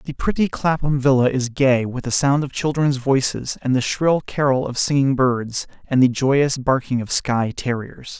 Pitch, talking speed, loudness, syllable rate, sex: 135 Hz, 190 wpm, -19 LUFS, 4.5 syllables/s, male